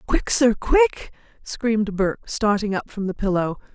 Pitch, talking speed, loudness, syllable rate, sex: 195 Hz, 145 wpm, -21 LUFS, 4.6 syllables/s, female